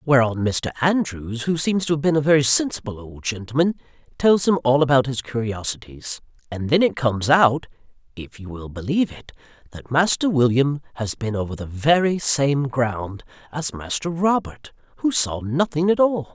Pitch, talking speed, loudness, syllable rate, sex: 140 Hz, 165 wpm, -21 LUFS, 4.9 syllables/s, male